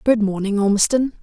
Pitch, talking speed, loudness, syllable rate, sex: 215 Hz, 145 wpm, -18 LUFS, 5.5 syllables/s, female